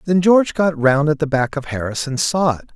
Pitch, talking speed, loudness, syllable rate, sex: 150 Hz, 260 wpm, -17 LUFS, 5.5 syllables/s, male